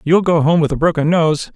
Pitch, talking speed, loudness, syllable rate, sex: 160 Hz, 270 wpm, -15 LUFS, 5.5 syllables/s, male